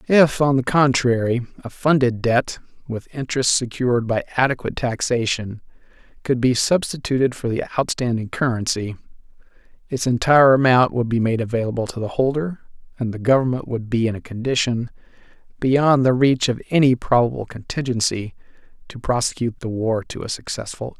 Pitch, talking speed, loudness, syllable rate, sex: 125 Hz, 150 wpm, -20 LUFS, 5.6 syllables/s, male